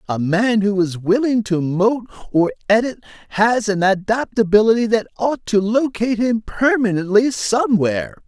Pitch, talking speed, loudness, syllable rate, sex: 215 Hz, 140 wpm, -17 LUFS, 4.8 syllables/s, male